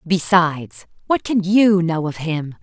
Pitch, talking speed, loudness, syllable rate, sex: 175 Hz, 160 wpm, -17 LUFS, 3.9 syllables/s, female